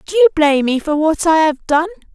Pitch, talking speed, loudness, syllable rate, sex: 320 Hz, 250 wpm, -14 LUFS, 6.0 syllables/s, female